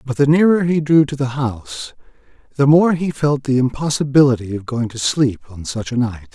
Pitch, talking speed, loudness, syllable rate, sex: 130 Hz, 210 wpm, -17 LUFS, 5.4 syllables/s, male